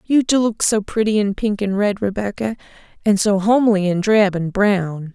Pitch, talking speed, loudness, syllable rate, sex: 205 Hz, 200 wpm, -18 LUFS, 4.8 syllables/s, female